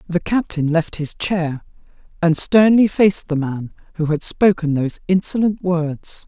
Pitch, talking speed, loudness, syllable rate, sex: 170 Hz, 155 wpm, -18 LUFS, 4.4 syllables/s, female